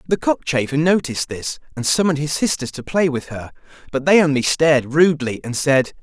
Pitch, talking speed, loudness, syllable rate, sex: 145 Hz, 190 wpm, -18 LUFS, 5.8 syllables/s, male